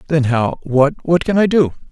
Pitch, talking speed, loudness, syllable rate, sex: 150 Hz, 155 wpm, -15 LUFS, 5.0 syllables/s, male